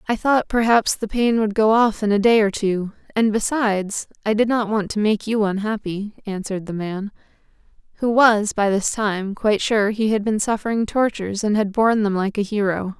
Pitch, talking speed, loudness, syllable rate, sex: 210 Hz, 210 wpm, -20 LUFS, 5.2 syllables/s, female